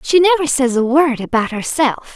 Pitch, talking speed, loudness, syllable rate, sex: 270 Hz, 195 wpm, -15 LUFS, 4.9 syllables/s, female